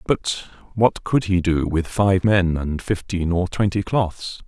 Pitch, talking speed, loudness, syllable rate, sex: 95 Hz, 175 wpm, -21 LUFS, 3.8 syllables/s, male